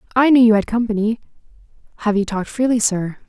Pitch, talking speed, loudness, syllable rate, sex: 220 Hz, 185 wpm, -17 LUFS, 6.8 syllables/s, female